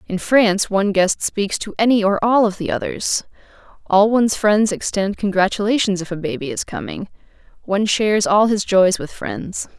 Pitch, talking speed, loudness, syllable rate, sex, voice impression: 200 Hz, 180 wpm, -18 LUFS, 5.2 syllables/s, female, very feminine, slightly adult-like, thin, tensed, powerful, bright, hard, very clear, very fluent, slightly raspy, cool, very intellectual, very refreshing, sincere, calm, very friendly, reassuring, unique, elegant, wild, sweet, lively, strict, slightly intense, slightly sharp